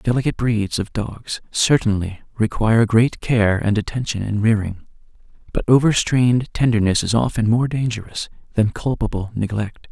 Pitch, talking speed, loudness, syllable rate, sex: 110 Hz, 135 wpm, -19 LUFS, 5.0 syllables/s, male